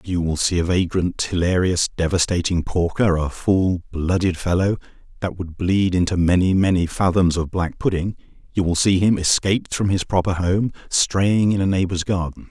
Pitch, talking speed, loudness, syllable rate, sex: 90 Hz, 165 wpm, -20 LUFS, 4.9 syllables/s, male